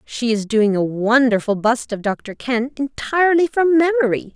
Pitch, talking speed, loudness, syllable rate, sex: 250 Hz, 165 wpm, -18 LUFS, 4.5 syllables/s, female